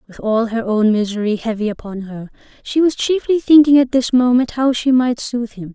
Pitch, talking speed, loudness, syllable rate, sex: 240 Hz, 210 wpm, -16 LUFS, 5.3 syllables/s, female